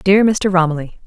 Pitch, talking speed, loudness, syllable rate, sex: 185 Hz, 170 wpm, -15 LUFS, 5.1 syllables/s, female